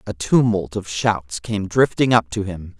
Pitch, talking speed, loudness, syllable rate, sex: 100 Hz, 195 wpm, -20 LUFS, 4.2 syllables/s, male